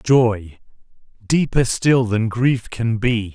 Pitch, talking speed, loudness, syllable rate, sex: 115 Hz, 110 wpm, -19 LUFS, 2.9 syllables/s, male